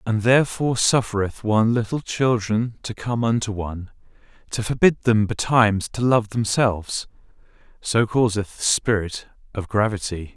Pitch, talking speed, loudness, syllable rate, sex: 110 Hz, 125 wpm, -21 LUFS, 4.8 syllables/s, male